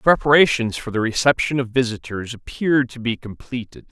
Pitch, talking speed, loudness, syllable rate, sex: 120 Hz, 170 wpm, -20 LUFS, 5.7 syllables/s, male